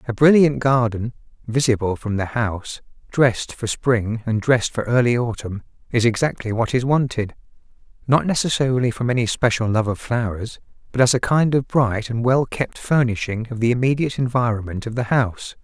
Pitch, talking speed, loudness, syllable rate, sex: 120 Hz, 170 wpm, -20 LUFS, 5.4 syllables/s, male